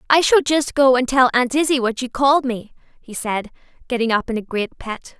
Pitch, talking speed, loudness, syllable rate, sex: 250 Hz, 230 wpm, -18 LUFS, 5.3 syllables/s, female